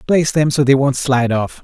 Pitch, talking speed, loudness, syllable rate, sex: 135 Hz, 255 wpm, -15 LUFS, 6.1 syllables/s, male